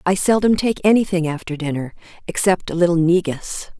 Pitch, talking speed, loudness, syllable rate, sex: 175 Hz, 160 wpm, -18 LUFS, 5.5 syllables/s, female